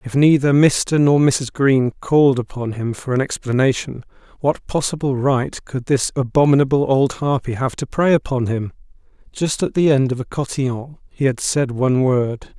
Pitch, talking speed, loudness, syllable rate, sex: 135 Hz, 175 wpm, -18 LUFS, 4.8 syllables/s, male